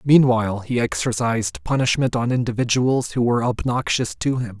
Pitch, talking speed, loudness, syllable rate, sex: 120 Hz, 145 wpm, -20 LUFS, 5.4 syllables/s, male